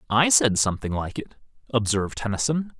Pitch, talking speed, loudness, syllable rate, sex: 115 Hz, 150 wpm, -23 LUFS, 5.8 syllables/s, male